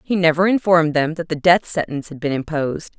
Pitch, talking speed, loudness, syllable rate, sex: 165 Hz, 220 wpm, -18 LUFS, 6.4 syllables/s, female